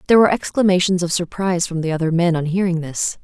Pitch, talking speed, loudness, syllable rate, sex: 175 Hz, 225 wpm, -18 LUFS, 6.9 syllables/s, female